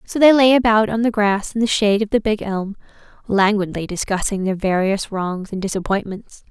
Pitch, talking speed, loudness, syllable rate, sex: 205 Hz, 195 wpm, -18 LUFS, 5.3 syllables/s, female